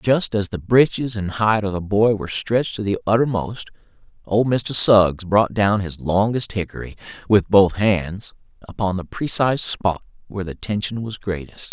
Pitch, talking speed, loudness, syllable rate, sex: 105 Hz, 175 wpm, -20 LUFS, 4.7 syllables/s, male